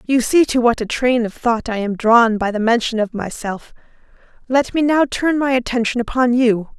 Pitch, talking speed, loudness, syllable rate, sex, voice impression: 240 Hz, 210 wpm, -17 LUFS, 4.9 syllables/s, female, feminine, slightly adult-like, slightly soft, slightly cute, friendly, kind